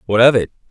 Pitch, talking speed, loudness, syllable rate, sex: 115 Hz, 255 wpm, -14 LUFS, 7.7 syllables/s, male